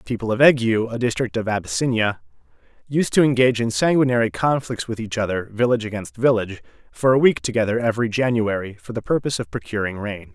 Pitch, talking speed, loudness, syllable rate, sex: 115 Hz, 185 wpm, -20 LUFS, 6.5 syllables/s, male